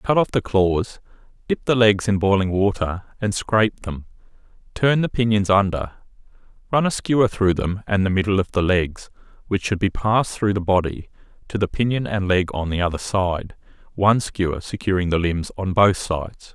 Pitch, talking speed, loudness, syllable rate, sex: 100 Hz, 190 wpm, -21 LUFS, 5.1 syllables/s, male